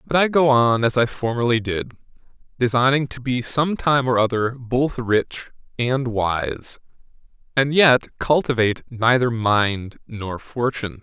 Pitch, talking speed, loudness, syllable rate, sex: 120 Hz, 140 wpm, -20 LUFS, 4.1 syllables/s, male